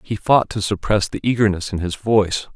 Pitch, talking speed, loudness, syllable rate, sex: 100 Hz, 210 wpm, -19 LUFS, 5.5 syllables/s, male